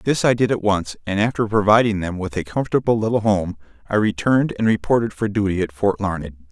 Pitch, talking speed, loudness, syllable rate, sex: 105 Hz, 210 wpm, -20 LUFS, 5.9 syllables/s, male